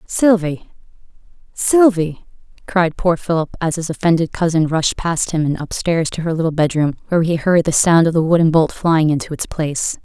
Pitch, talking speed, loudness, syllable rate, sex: 165 Hz, 185 wpm, -16 LUFS, 5.2 syllables/s, female